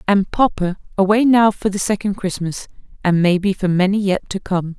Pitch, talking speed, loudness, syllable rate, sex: 195 Hz, 190 wpm, -18 LUFS, 5.1 syllables/s, female